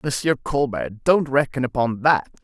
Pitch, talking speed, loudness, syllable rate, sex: 135 Hz, 150 wpm, -21 LUFS, 4.5 syllables/s, male